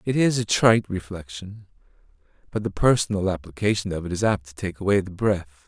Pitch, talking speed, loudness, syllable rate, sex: 100 Hz, 190 wpm, -23 LUFS, 5.7 syllables/s, male